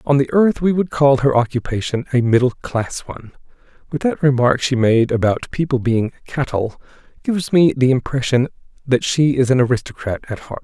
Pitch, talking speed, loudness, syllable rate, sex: 130 Hz, 180 wpm, -17 LUFS, 5.5 syllables/s, male